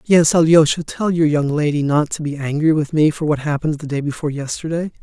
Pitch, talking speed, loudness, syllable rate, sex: 155 Hz, 225 wpm, -17 LUFS, 6.0 syllables/s, male